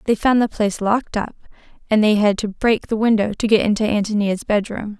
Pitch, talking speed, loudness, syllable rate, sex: 215 Hz, 215 wpm, -18 LUFS, 5.8 syllables/s, female